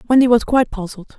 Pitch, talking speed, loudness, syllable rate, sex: 230 Hz, 205 wpm, -15 LUFS, 7.7 syllables/s, female